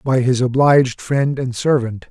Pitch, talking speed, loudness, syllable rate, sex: 130 Hz, 170 wpm, -16 LUFS, 4.6 syllables/s, male